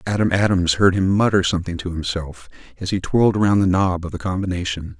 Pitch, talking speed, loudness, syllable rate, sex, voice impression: 90 Hz, 205 wpm, -19 LUFS, 6.2 syllables/s, male, masculine, middle-aged, tensed, powerful, slightly hard, muffled, intellectual, calm, slightly mature, reassuring, wild, slightly lively, slightly strict